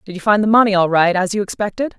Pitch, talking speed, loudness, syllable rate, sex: 200 Hz, 300 wpm, -15 LUFS, 7.0 syllables/s, female